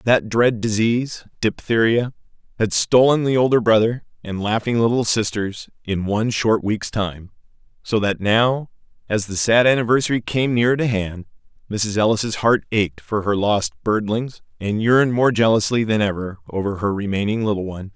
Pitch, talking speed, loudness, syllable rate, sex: 110 Hz, 160 wpm, -19 LUFS, 4.9 syllables/s, male